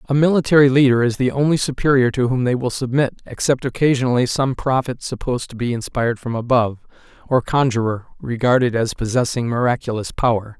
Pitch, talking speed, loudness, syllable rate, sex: 125 Hz, 165 wpm, -18 LUFS, 6.1 syllables/s, male